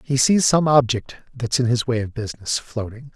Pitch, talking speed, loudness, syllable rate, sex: 125 Hz, 210 wpm, -20 LUFS, 5.1 syllables/s, male